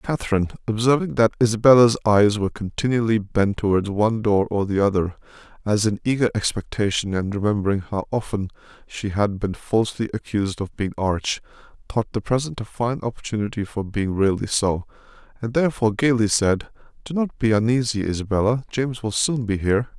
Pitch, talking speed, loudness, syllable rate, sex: 110 Hz, 160 wpm, -22 LUFS, 5.8 syllables/s, male